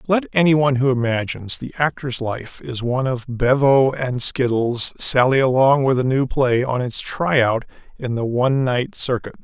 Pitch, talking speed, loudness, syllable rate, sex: 130 Hz, 185 wpm, -19 LUFS, 4.8 syllables/s, male